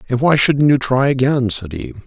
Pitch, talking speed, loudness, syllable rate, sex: 125 Hz, 230 wpm, -15 LUFS, 5.3 syllables/s, male